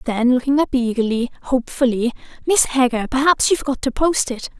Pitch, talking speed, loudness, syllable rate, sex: 260 Hz, 170 wpm, -18 LUFS, 5.8 syllables/s, female